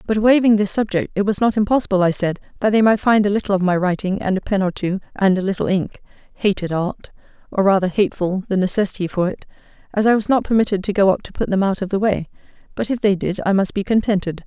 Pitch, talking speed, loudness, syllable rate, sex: 200 Hz, 245 wpm, -18 LUFS, 5.7 syllables/s, female